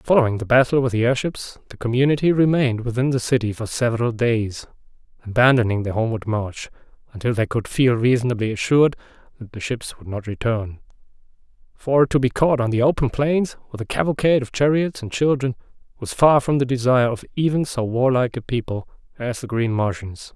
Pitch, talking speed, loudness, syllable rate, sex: 125 Hz, 185 wpm, -20 LUFS, 5.9 syllables/s, male